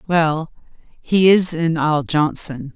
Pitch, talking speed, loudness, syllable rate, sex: 160 Hz, 130 wpm, -17 LUFS, 3.6 syllables/s, female